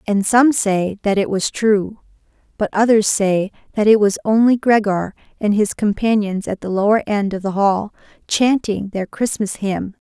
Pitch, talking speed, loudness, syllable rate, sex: 210 Hz, 175 wpm, -17 LUFS, 4.4 syllables/s, female